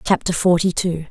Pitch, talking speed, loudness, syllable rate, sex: 170 Hz, 165 wpm, -18 LUFS, 5.3 syllables/s, female